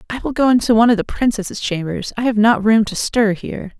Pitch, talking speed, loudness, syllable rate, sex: 220 Hz, 255 wpm, -16 LUFS, 6.3 syllables/s, female